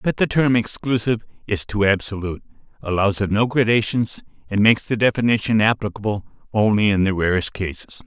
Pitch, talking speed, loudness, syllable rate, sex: 105 Hz, 155 wpm, -20 LUFS, 5.9 syllables/s, male